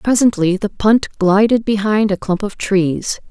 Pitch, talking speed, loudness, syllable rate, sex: 205 Hz, 165 wpm, -15 LUFS, 4.1 syllables/s, female